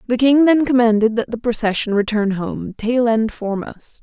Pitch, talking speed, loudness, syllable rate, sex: 230 Hz, 180 wpm, -17 LUFS, 5.0 syllables/s, female